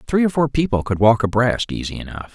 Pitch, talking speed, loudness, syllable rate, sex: 120 Hz, 230 wpm, -18 LUFS, 5.9 syllables/s, male